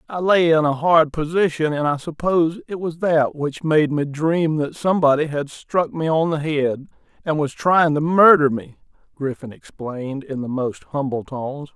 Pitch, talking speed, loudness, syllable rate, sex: 150 Hz, 190 wpm, -20 LUFS, 4.7 syllables/s, male